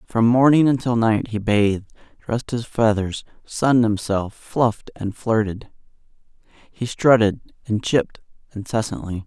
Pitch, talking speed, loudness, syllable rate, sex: 110 Hz, 125 wpm, -20 LUFS, 4.5 syllables/s, male